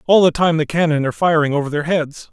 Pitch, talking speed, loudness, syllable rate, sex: 160 Hz, 260 wpm, -17 LUFS, 6.5 syllables/s, male